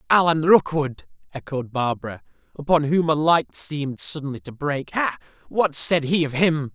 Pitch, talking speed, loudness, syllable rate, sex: 145 Hz, 160 wpm, -21 LUFS, 4.8 syllables/s, male